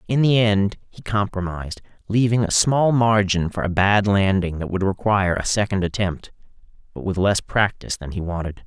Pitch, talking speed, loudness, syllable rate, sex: 100 Hz, 180 wpm, -20 LUFS, 5.2 syllables/s, male